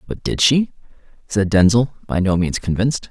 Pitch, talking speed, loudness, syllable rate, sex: 105 Hz, 175 wpm, -18 LUFS, 5.2 syllables/s, male